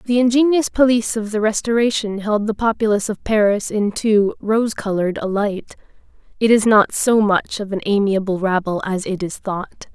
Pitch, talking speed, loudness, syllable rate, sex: 210 Hz, 180 wpm, -18 LUFS, 5.2 syllables/s, female